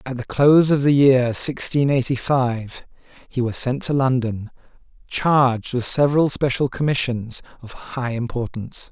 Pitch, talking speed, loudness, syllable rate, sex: 130 Hz, 150 wpm, -19 LUFS, 4.5 syllables/s, male